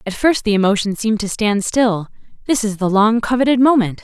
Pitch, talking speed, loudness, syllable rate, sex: 220 Hz, 195 wpm, -16 LUFS, 5.4 syllables/s, female